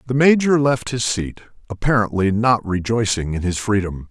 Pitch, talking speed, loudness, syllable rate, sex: 110 Hz, 160 wpm, -19 LUFS, 5.0 syllables/s, male